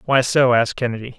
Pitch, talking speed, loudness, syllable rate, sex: 125 Hz, 200 wpm, -18 LUFS, 6.7 syllables/s, male